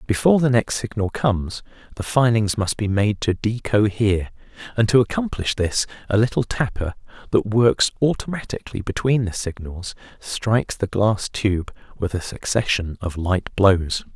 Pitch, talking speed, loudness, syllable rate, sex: 105 Hz, 155 wpm, -21 LUFS, 4.8 syllables/s, male